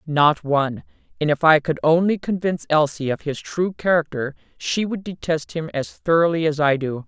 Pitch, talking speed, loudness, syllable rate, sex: 160 Hz, 185 wpm, -21 LUFS, 5.1 syllables/s, female